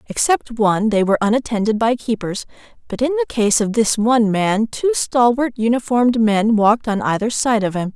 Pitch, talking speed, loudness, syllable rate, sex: 225 Hz, 190 wpm, -17 LUFS, 5.5 syllables/s, female